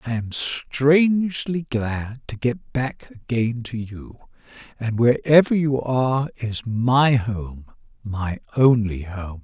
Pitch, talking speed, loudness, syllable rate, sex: 120 Hz, 120 wpm, -21 LUFS, 3.3 syllables/s, male